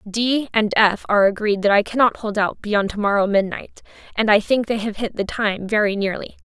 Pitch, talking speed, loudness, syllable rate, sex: 210 Hz, 220 wpm, -19 LUFS, 5.3 syllables/s, female